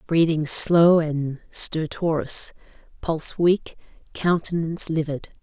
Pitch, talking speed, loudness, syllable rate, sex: 160 Hz, 90 wpm, -21 LUFS, 3.8 syllables/s, female